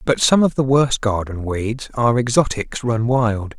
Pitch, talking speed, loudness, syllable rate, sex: 120 Hz, 185 wpm, -18 LUFS, 4.3 syllables/s, male